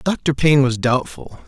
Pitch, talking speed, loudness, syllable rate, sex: 140 Hz, 160 wpm, -17 LUFS, 4.6 syllables/s, male